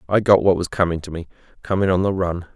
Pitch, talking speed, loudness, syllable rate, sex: 90 Hz, 235 wpm, -19 LUFS, 6.5 syllables/s, male